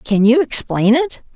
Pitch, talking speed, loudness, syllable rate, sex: 250 Hz, 175 wpm, -15 LUFS, 4.3 syllables/s, female